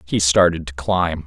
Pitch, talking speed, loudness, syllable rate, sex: 85 Hz, 190 wpm, -18 LUFS, 4.4 syllables/s, male